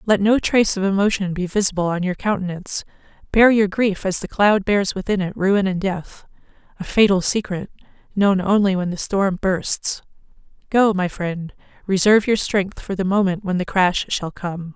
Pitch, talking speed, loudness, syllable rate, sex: 195 Hz, 180 wpm, -19 LUFS, 4.9 syllables/s, female